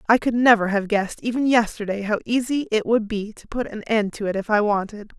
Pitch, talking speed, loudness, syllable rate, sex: 220 Hz, 245 wpm, -21 LUFS, 5.8 syllables/s, female